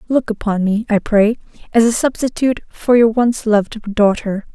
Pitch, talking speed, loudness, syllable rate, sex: 220 Hz, 170 wpm, -16 LUFS, 5.1 syllables/s, female